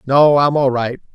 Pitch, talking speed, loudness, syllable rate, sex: 135 Hz, 210 wpm, -15 LUFS, 4.6 syllables/s, male